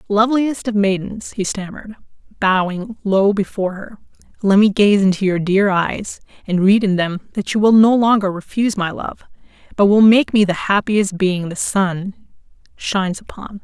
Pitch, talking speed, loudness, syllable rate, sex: 200 Hz, 170 wpm, -16 LUFS, 4.9 syllables/s, female